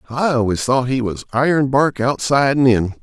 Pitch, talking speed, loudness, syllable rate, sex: 130 Hz, 180 wpm, -17 LUFS, 5.2 syllables/s, male